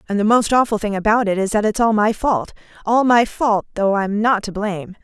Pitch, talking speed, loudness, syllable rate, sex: 210 Hz, 240 wpm, -17 LUFS, 5.5 syllables/s, female